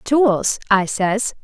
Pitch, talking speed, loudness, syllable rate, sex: 220 Hz, 125 wpm, -17 LUFS, 2.6 syllables/s, female